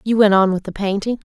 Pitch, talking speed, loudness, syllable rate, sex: 205 Hz, 275 wpm, -17 LUFS, 6.1 syllables/s, female